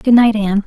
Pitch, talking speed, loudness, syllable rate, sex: 215 Hz, 270 wpm, -13 LUFS, 6.7 syllables/s, female